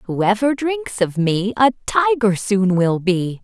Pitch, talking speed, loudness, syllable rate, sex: 220 Hz, 155 wpm, -18 LUFS, 3.5 syllables/s, female